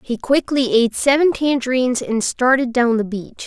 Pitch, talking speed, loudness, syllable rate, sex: 250 Hz, 175 wpm, -17 LUFS, 5.2 syllables/s, female